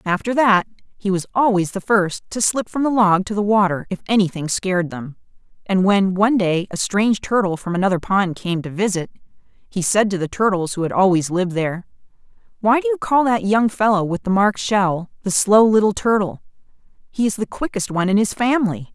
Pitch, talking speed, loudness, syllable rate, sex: 200 Hz, 205 wpm, -18 LUFS, 5.7 syllables/s, female